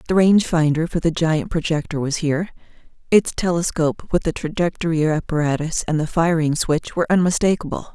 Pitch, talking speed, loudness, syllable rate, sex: 165 Hz, 160 wpm, -20 LUFS, 5.8 syllables/s, female